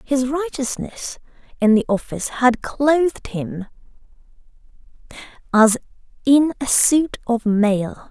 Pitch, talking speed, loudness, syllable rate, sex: 245 Hz, 105 wpm, -19 LUFS, 3.7 syllables/s, female